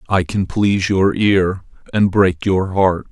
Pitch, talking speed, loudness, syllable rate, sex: 95 Hz, 175 wpm, -16 LUFS, 3.9 syllables/s, male